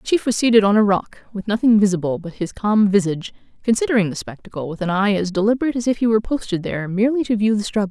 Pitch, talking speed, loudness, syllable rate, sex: 210 Hz, 250 wpm, -19 LUFS, 7.2 syllables/s, female